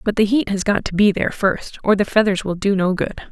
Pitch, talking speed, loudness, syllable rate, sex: 200 Hz, 290 wpm, -18 LUFS, 5.9 syllables/s, female